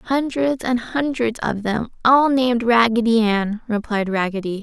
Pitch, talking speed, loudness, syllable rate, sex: 235 Hz, 145 wpm, -19 LUFS, 4.3 syllables/s, female